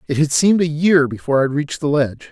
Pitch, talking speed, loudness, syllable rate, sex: 150 Hz, 235 wpm, -17 LUFS, 6.5 syllables/s, male